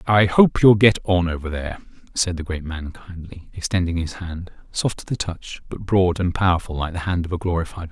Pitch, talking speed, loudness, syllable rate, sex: 90 Hz, 225 wpm, -21 LUFS, 5.6 syllables/s, male